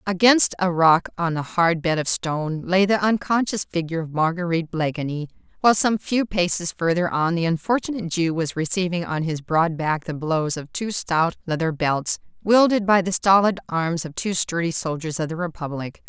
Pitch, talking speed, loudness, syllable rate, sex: 175 Hz, 185 wpm, -21 LUFS, 5.1 syllables/s, female